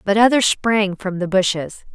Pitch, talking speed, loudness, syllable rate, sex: 200 Hz, 185 wpm, -17 LUFS, 4.5 syllables/s, female